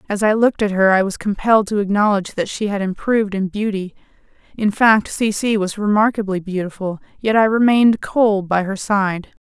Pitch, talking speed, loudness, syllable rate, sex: 205 Hz, 190 wpm, -17 LUFS, 5.5 syllables/s, female